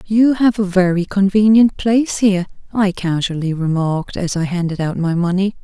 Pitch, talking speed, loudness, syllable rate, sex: 190 Hz, 170 wpm, -16 LUFS, 5.2 syllables/s, female